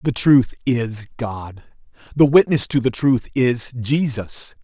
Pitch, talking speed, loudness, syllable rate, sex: 125 Hz, 140 wpm, -18 LUFS, 3.5 syllables/s, male